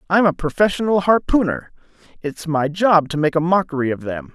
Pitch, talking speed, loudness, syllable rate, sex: 165 Hz, 180 wpm, -18 LUFS, 5.5 syllables/s, male